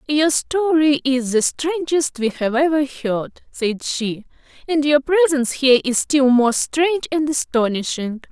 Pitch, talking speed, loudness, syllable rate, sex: 275 Hz, 150 wpm, -18 LUFS, 4.2 syllables/s, female